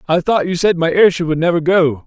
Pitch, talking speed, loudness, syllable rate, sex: 170 Hz, 260 wpm, -14 LUFS, 5.8 syllables/s, male